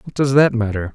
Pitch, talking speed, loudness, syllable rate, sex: 125 Hz, 255 wpm, -17 LUFS, 6.0 syllables/s, male